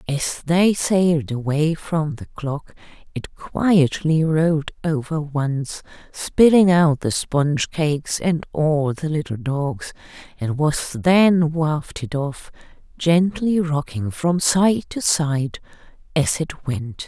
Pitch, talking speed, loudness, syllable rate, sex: 155 Hz, 125 wpm, -20 LUFS, 3.3 syllables/s, female